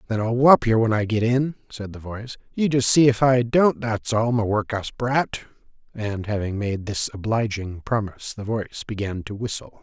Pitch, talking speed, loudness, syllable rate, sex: 115 Hz, 200 wpm, -22 LUFS, 5.1 syllables/s, male